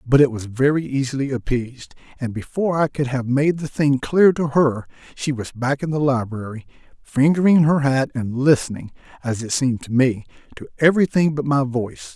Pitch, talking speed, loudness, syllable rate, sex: 135 Hz, 190 wpm, -20 LUFS, 5.4 syllables/s, male